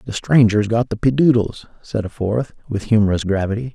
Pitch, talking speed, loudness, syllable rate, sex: 110 Hz, 175 wpm, -18 LUFS, 5.4 syllables/s, male